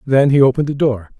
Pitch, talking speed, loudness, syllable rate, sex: 130 Hz, 250 wpm, -14 LUFS, 6.7 syllables/s, male